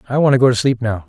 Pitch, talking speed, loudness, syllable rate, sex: 125 Hz, 390 wpm, -15 LUFS, 7.9 syllables/s, male